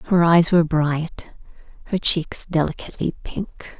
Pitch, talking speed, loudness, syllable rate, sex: 165 Hz, 125 wpm, -20 LUFS, 4.2 syllables/s, female